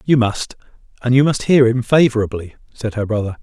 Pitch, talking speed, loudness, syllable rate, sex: 120 Hz, 190 wpm, -16 LUFS, 5.5 syllables/s, male